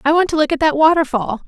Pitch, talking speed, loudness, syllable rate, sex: 300 Hz, 285 wpm, -15 LUFS, 6.8 syllables/s, female